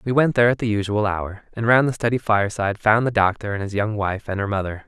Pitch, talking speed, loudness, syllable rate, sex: 105 Hz, 270 wpm, -21 LUFS, 6.4 syllables/s, male